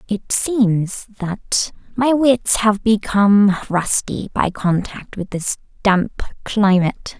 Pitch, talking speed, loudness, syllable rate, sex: 205 Hz, 115 wpm, -17 LUFS, 3.3 syllables/s, female